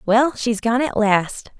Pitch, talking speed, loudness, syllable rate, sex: 230 Hz, 190 wpm, -19 LUFS, 3.6 syllables/s, female